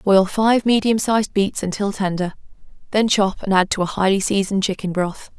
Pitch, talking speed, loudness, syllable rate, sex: 200 Hz, 190 wpm, -19 LUFS, 5.3 syllables/s, female